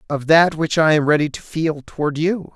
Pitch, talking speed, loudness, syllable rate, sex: 155 Hz, 235 wpm, -18 LUFS, 5.1 syllables/s, male